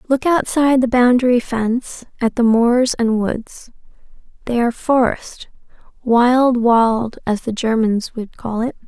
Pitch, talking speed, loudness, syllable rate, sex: 240 Hz, 135 wpm, -16 LUFS, 4.1 syllables/s, female